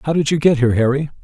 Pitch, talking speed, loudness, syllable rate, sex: 140 Hz, 290 wpm, -16 LUFS, 8.0 syllables/s, male